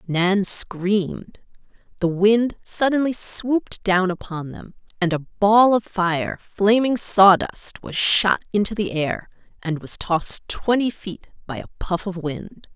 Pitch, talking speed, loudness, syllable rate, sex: 195 Hz, 145 wpm, -20 LUFS, 3.8 syllables/s, female